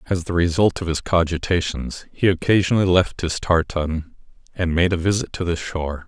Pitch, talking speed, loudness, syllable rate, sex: 85 Hz, 180 wpm, -21 LUFS, 5.2 syllables/s, male